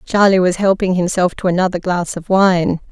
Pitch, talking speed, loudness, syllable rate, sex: 185 Hz, 185 wpm, -15 LUFS, 5.1 syllables/s, female